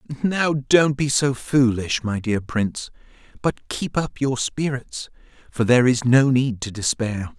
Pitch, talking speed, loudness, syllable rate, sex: 125 Hz, 160 wpm, -21 LUFS, 4.2 syllables/s, male